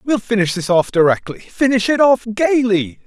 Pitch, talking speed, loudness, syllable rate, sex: 215 Hz, 175 wpm, -16 LUFS, 4.9 syllables/s, male